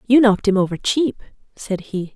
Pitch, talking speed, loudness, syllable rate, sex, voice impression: 210 Hz, 195 wpm, -19 LUFS, 5.3 syllables/s, female, very feminine, slightly adult-like, thin, slightly tensed, powerful, bright, slightly soft, clear, slightly fluent, slightly cute, intellectual, refreshing, sincere, calm, friendly, reassuring, slightly unique, elegant, slightly wild, sweet, lively, strict, intense, slightly sharp, slightly light